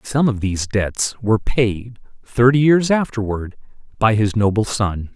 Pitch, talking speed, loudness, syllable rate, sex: 115 Hz, 150 wpm, -18 LUFS, 4.4 syllables/s, male